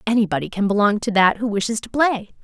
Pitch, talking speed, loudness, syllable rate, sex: 210 Hz, 220 wpm, -19 LUFS, 6.4 syllables/s, female